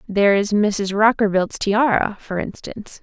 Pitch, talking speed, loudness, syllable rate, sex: 205 Hz, 140 wpm, -19 LUFS, 4.6 syllables/s, female